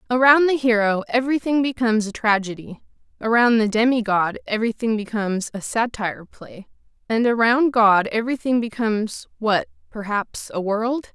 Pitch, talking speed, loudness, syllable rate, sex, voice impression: 225 Hz, 125 wpm, -20 LUFS, 5.2 syllables/s, female, feminine, slightly adult-like, slightly sincere, friendly, slightly sweet